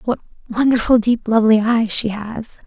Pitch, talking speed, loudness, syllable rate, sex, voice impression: 225 Hz, 160 wpm, -17 LUFS, 5.0 syllables/s, female, feminine, adult-like, tensed, powerful, bright, clear, slightly fluent, intellectual, friendly, elegant, kind, modest